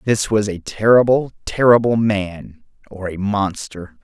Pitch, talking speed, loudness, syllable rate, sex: 105 Hz, 135 wpm, -17 LUFS, 4.0 syllables/s, male